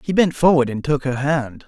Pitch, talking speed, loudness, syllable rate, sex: 140 Hz, 250 wpm, -18 LUFS, 5.1 syllables/s, male